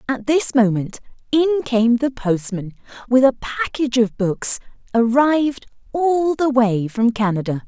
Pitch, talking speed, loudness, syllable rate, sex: 240 Hz, 140 wpm, -18 LUFS, 4.3 syllables/s, female